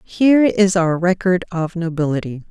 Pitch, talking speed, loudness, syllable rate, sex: 180 Hz, 145 wpm, -17 LUFS, 4.8 syllables/s, female